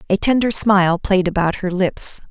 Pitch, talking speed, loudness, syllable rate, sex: 190 Hz, 180 wpm, -17 LUFS, 4.9 syllables/s, female